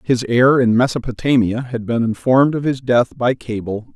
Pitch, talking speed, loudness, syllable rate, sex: 125 Hz, 180 wpm, -17 LUFS, 5.0 syllables/s, male